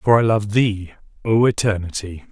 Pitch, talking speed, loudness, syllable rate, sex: 105 Hz, 155 wpm, -19 LUFS, 4.7 syllables/s, male